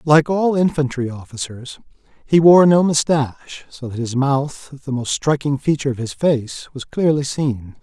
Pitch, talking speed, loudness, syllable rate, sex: 140 Hz, 170 wpm, -18 LUFS, 4.5 syllables/s, male